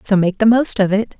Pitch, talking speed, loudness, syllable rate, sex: 210 Hz, 300 wpm, -15 LUFS, 5.5 syllables/s, female